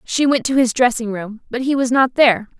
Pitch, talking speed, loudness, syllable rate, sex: 245 Hz, 255 wpm, -17 LUFS, 5.5 syllables/s, female